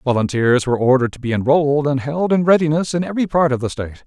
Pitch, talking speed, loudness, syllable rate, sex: 140 Hz, 235 wpm, -17 LUFS, 7.3 syllables/s, male